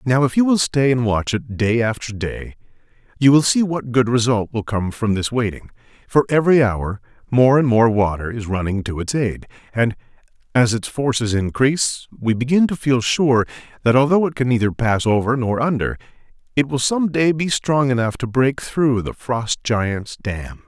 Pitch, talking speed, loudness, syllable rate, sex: 125 Hz, 195 wpm, -19 LUFS, 4.8 syllables/s, male